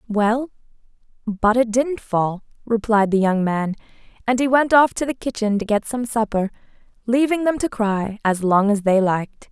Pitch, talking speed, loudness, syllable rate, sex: 225 Hz, 185 wpm, -20 LUFS, 4.7 syllables/s, female